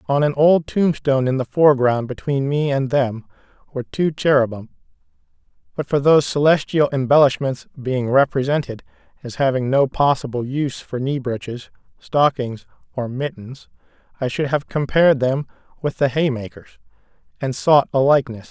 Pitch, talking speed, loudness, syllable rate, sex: 135 Hz, 145 wpm, -19 LUFS, 5.2 syllables/s, male